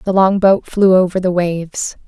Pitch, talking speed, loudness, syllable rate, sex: 185 Hz, 175 wpm, -14 LUFS, 4.6 syllables/s, female